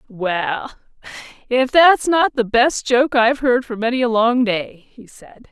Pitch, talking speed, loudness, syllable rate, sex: 240 Hz, 175 wpm, -17 LUFS, 4.0 syllables/s, female